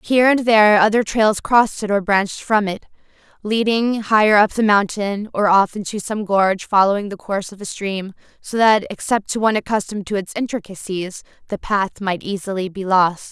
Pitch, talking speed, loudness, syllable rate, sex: 205 Hz, 190 wpm, -18 LUFS, 5.4 syllables/s, female